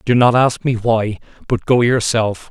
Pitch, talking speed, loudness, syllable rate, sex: 115 Hz, 190 wpm, -16 LUFS, 4.3 syllables/s, male